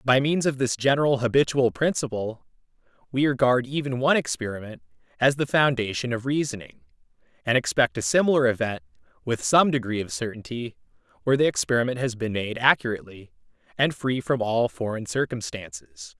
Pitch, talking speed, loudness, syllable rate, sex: 120 Hz, 150 wpm, -24 LUFS, 5.7 syllables/s, male